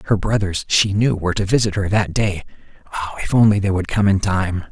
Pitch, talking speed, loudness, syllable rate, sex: 100 Hz, 205 wpm, -18 LUFS, 5.7 syllables/s, male